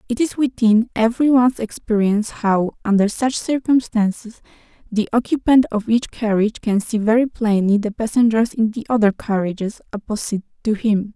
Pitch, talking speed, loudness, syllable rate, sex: 220 Hz, 150 wpm, -18 LUFS, 5.3 syllables/s, female